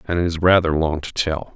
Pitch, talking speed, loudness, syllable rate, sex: 85 Hz, 270 wpm, -19 LUFS, 5.5 syllables/s, male